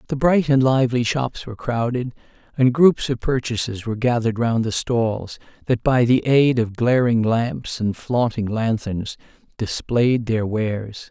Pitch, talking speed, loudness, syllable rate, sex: 115 Hz, 155 wpm, -20 LUFS, 4.4 syllables/s, male